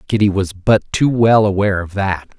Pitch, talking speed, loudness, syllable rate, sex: 100 Hz, 200 wpm, -15 LUFS, 5.1 syllables/s, male